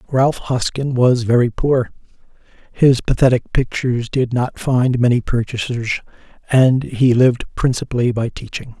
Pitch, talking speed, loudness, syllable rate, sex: 125 Hz, 130 wpm, -17 LUFS, 4.7 syllables/s, male